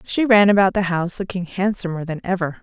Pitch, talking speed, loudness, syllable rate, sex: 185 Hz, 205 wpm, -19 LUFS, 6.1 syllables/s, female